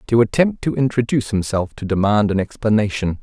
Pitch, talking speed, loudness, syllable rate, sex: 110 Hz, 165 wpm, -18 LUFS, 5.8 syllables/s, male